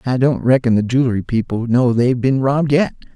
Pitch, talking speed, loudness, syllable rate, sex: 125 Hz, 210 wpm, -16 LUFS, 5.9 syllables/s, male